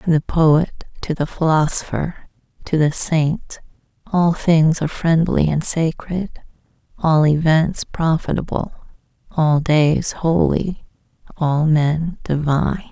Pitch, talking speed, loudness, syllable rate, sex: 155 Hz, 110 wpm, -18 LUFS, 3.7 syllables/s, female